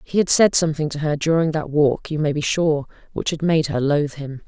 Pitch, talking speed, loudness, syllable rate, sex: 155 Hz, 255 wpm, -20 LUFS, 5.6 syllables/s, female